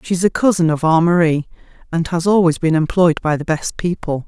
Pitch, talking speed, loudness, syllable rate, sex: 165 Hz, 210 wpm, -16 LUFS, 5.4 syllables/s, female